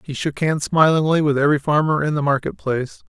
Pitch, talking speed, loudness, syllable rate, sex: 150 Hz, 215 wpm, -19 LUFS, 6.1 syllables/s, male